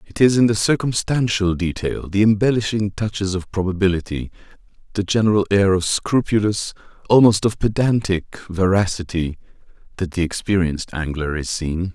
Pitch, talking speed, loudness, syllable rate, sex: 95 Hz, 120 wpm, -19 LUFS, 5.2 syllables/s, male